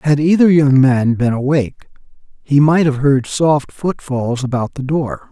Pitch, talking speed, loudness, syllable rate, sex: 140 Hz, 170 wpm, -14 LUFS, 4.3 syllables/s, male